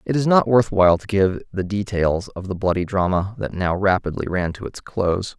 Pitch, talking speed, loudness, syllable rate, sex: 95 Hz, 225 wpm, -20 LUFS, 5.3 syllables/s, male